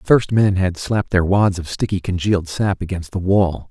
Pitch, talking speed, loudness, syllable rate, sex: 95 Hz, 225 wpm, -18 LUFS, 5.2 syllables/s, male